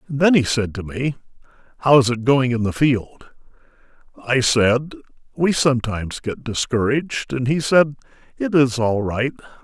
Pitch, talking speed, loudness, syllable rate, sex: 130 Hz, 155 wpm, -19 LUFS, 4.6 syllables/s, male